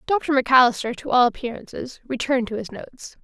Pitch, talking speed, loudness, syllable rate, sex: 255 Hz, 165 wpm, -21 LUFS, 6.2 syllables/s, female